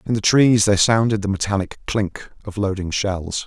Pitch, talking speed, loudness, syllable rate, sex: 100 Hz, 190 wpm, -19 LUFS, 5.1 syllables/s, male